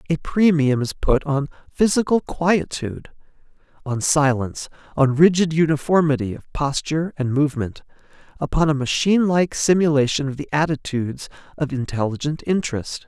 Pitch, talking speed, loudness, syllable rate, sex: 150 Hz, 125 wpm, -20 LUFS, 5.3 syllables/s, male